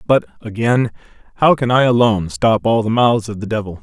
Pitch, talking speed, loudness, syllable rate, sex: 110 Hz, 205 wpm, -16 LUFS, 5.5 syllables/s, male